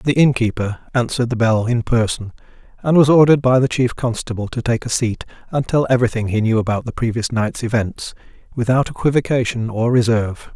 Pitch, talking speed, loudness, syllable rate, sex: 120 Hz, 180 wpm, -18 LUFS, 5.8 syllables/s, male